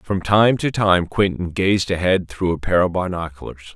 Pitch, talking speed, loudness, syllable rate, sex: 90 Hz, 190 wpm, -19 LUFS, 4.6 syllables/s, male